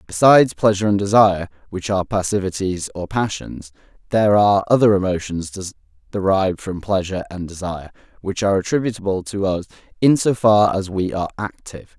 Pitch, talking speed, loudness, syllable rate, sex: 95 Hz, 150 wpm, -19 LUFS, 6.0 syllables/s, male